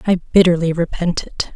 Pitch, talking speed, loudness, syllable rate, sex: 170 Hz, 155 wpm, -17 LUFS, 5.5 syllables/s, female